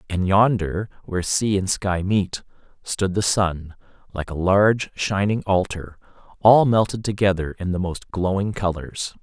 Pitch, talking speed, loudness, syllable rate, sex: 95 Hz, 150 wpm, -21 LUFS, 4.4 syllables/s, male